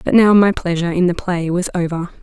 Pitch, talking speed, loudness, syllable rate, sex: 180 Hz, 245 wpm, -16 LUFS, 5.9 syllables/s, female